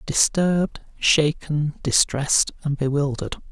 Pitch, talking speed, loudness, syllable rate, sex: 145 Hz, 85 wpm, -21 LUFS, 4.3 syllables/s, male